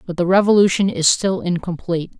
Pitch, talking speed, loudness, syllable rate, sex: 180 Hz, 165 wpm, -17 LUFS, 6.0 syllables/s, female